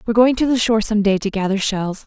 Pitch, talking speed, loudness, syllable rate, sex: 215 Hz, 290 wpm, -18 LUFS, 6.7 syllables/s, female